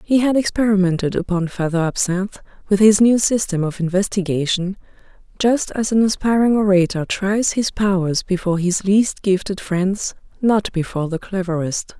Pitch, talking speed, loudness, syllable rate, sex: 195 Hz, 145 wpm, -18 LUFS, 5.0 syllables/s, female